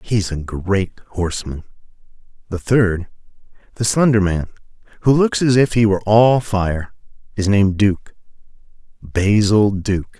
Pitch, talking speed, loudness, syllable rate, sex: 100 Hz, 130 wpm, -17 LUFS, 4.4 syllables/s, male